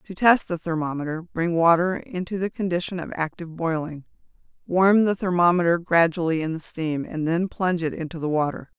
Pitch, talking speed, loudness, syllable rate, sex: 170 Hz, 180 wpm, -23 LUFS, 5.5 syllables/s, female